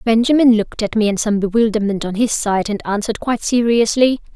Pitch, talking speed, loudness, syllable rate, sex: 220 Hz, 195 wpm, -16 LUFS, 6.1 syllables/s, female